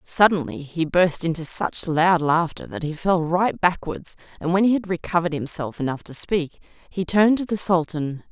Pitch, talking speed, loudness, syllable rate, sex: 170 Hz, 190 wpm, -22 LUFS, 5.0 syllables/s, female